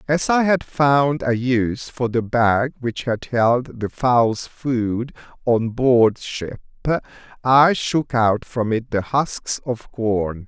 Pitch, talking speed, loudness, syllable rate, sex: 120 Hz, 155 wpm, -20 LUFS, 3.1 syllables/s, male